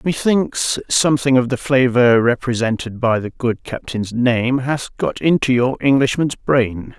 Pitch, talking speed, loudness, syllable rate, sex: 125 Hz, 145 wpm, -17 LUFS, 4.2 syllables/s, male